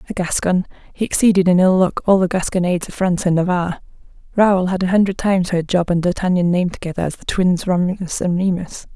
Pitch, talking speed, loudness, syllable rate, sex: 180 Hz, 210 wpm, -17 LUFS, 6.4 syllables/s, female